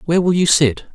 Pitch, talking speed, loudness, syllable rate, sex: 160 Hz, 255 wpm, -15 LUFS, 6.5 syllables/s, male